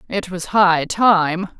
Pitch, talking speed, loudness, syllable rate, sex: 180 Hz, 150 wpm, -17 LUFS, 2.8 syllables/s, female